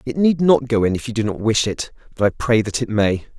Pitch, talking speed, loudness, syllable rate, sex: 115 Hz, 300 wpm, -19 LUFS, 5.8 syllables/s, male